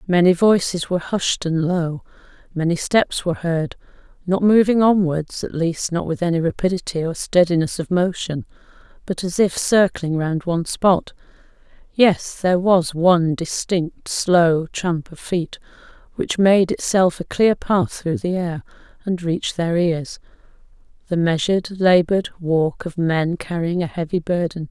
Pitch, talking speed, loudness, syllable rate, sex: 175 Hz, 150 wpm, -19 LUFS, 4.5 syllables/s, female